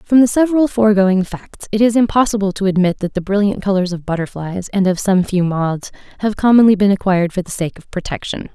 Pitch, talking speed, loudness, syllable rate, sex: 200 Hz, 210 wpm, -16 LUFS, 5.9 syllables/s, female